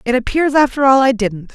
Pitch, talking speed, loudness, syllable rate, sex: 255 Hz, 230 wpm, -14 LUFS, 5.6 syllables/s, female